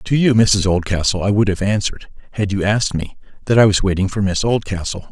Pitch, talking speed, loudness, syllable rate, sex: 100 Hz, 225 wpm, -17 LUFS, 6.1 syllables/s, male